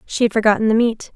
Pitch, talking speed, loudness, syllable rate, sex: 220 Hz, 260 wpm, -17 LUFS, 6.9 syllables/s, female